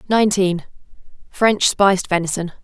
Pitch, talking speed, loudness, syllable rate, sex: 190 Hz, 70 wpm, -17 LUFS, 5.3 syllables/s, female